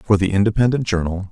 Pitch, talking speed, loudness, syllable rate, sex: 100 Hz, 180 wpm, -18 LUFS, 6.8 syllables/s, male